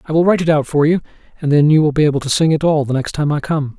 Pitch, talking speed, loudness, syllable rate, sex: 150 Hz, 350 wpm, -15 LUFS, 7.3 syllables/s, male